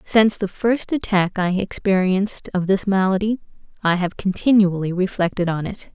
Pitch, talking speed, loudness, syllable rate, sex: 195 Hz, 150 wpm, -20 LUFS, 5.0 syllables/s, female